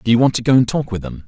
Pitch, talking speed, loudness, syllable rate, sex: 115 Hz, 425 wpm, -16 LUFS, 7.7 syllables/s, male